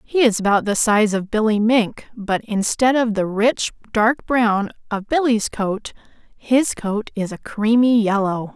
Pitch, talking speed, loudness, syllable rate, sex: 220 Hz, 170 wpm, -19 LUFS, 4.0 syllables/s, female